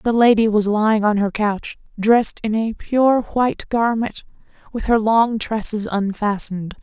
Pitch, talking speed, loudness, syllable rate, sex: 220 Hz, 160 wpm, -18 LUFS, 4.5 syllables/s, female